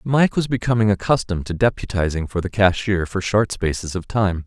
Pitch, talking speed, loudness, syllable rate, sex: 100 Hz, 190 wpm, -20 LUFS, 5.5 syllables/s, male